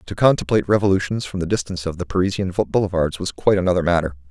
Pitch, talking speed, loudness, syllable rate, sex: 90 Hz, 195 wpm, -20 LUFS, 7.4 syllables/s, male